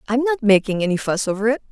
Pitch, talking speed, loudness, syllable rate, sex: 225 Hz, 245 wpm, -19 LUFS, 6.7 syllables/s, female